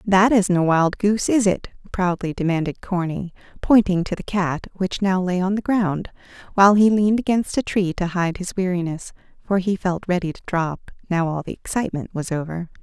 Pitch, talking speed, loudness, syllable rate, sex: 185 Hz, 195 wpm, -21 LUFS, 5.3 syllables/s, female